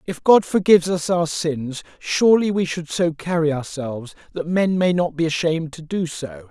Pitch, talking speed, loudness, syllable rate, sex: 165 Hz, 195 wpm, -20 LUFS, 4.9 syllables/s, male